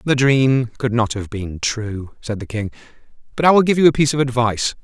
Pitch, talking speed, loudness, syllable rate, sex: 120 Hz, 235 wpm, -18 LUFS, 5.5 syllables/s, male